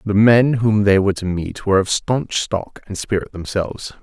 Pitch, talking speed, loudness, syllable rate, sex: 105 Hz, 210 wpm, -18 LUFS, 5.0 syllables/s, male